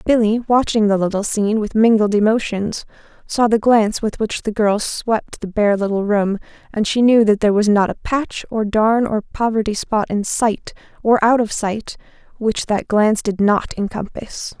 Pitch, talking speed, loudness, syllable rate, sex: 215 Hz, 190 wpm, -17 LUFS, 4.7 syllables/s, female